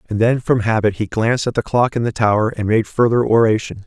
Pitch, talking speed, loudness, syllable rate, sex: 110 Hz, 250 wpm, -17 LUFS, 5.9 syllables/s, male